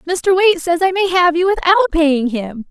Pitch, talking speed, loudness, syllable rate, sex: 340 Hz, 220 wpm, -14 LUFS, 4.9 syllables/s, female